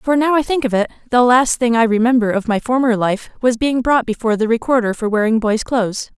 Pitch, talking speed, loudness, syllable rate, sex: 235 Hz, 240 wpm, -16 LUFS, 6.0 syllables/s, female